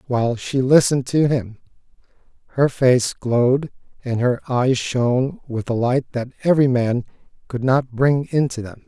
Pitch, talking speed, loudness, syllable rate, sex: 125 Hz, 155 wpm, -19 LUFS, 4.6 syllables/s, male